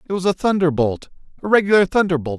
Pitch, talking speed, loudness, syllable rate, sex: 175 Hz, 175 wpm, -18 LUFS, 6.6 syllables/s, male